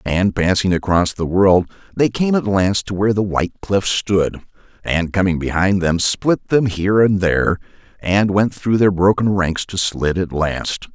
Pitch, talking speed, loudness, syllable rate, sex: 95 Hz, 185 wpm, -17 LUFS, 4.5 syllables/s, male